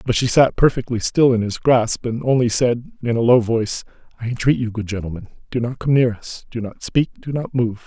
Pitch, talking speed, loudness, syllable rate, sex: 120 Hz, 235 wpm, -19 LUFS, 5.6 syllables/s, male